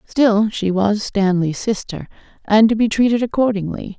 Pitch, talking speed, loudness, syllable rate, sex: 210 Hz, 150 wpm, -17 LUFS, 4.6 syllables/s, female